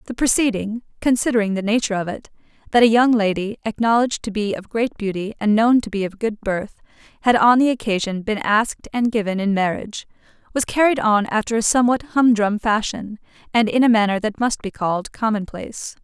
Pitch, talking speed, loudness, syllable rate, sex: 220 Hz, 185 wpm, -19 LUFS, 5.9 syllables/s, female